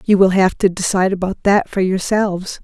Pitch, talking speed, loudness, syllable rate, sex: 190 Hz, 205 wpm, -16 LUFS, 5.5 syllables/s, female